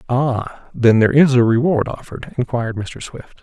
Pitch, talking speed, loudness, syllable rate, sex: 120 Hz, 175 wpm, -17 LUFS, 5.1 syllables/s, male